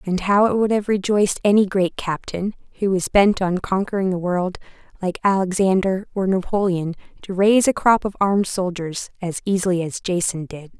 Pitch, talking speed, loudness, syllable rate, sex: 190 Hz, 180 wpm, -20 LUFS, 5.3 syllables/s, female